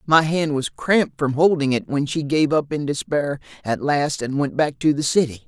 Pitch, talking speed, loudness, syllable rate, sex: 145 Hz, 230 wpm, -21 LUFS, 5.0 syllables/s, male